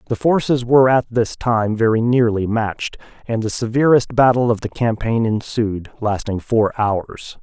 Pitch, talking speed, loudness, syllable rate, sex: 115 Hz, 160 wpm, -18 LUFS, 4.6 syllables/s, male